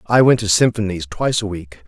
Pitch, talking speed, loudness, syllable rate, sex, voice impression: 105 Hz, 225 wpm, -17 LUFS, 5.8 syllables/s, male, masculine, middle-aged, powerful, hard, raspy, sincere, mature, wild, lively, strict